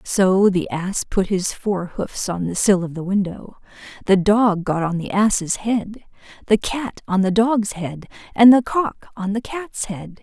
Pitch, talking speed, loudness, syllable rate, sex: 200 Hz, 195 wpm, -19 LUFS, 3.9 syllables/s, female